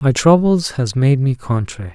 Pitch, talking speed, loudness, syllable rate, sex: 135 Hz, 185 wpm, -15 LUFS, 4.7 syllables/s, male